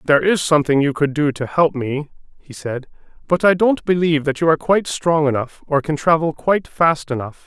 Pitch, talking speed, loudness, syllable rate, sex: 155 Hz, 215 wpm, -18 LUFS, 5.7 syllables/s, male